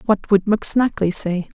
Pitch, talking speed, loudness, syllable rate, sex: 200 Hz, 150 wpm, -18 LUFS, 5.2 syllables/s, female